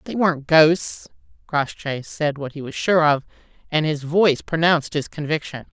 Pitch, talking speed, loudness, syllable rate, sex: 155 Hz, 165 wpm, -20 LUFS, 4.9 syllables/s, female